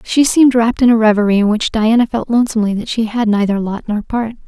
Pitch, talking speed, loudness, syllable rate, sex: 225 Hz, 240 wpm, -14 LUFS, 6.6 syllables/s, female